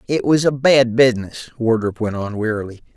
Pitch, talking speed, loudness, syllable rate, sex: 120 Hz, 180 wpm, -17 LUFS, 5.7 syllables/s, male